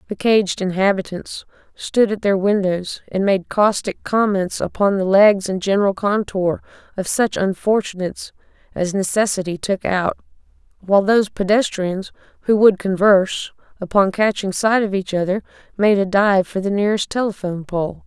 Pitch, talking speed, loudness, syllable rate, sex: 195 Hz, 145 wpm, -18 LUFS, 4.9 syllables/s, female